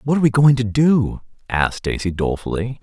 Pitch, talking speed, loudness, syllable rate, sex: 125 Hz, 190 wpm, -18 LUFS, 5.9 syllables/s, male